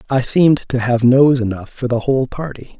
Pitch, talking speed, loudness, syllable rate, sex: 130 Hz, 215 wpm, -15 LUFS, 5.4 syllables/s, male